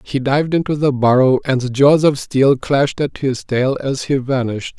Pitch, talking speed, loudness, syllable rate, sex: 135 Hz, 200 wpm, -16 LUFS, 4.8 syllables/s, male